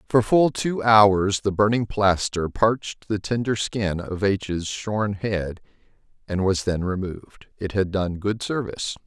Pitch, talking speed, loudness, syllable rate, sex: 100 Hz, 160 wpm, -23 LUFS, 4.0 syllables/s, male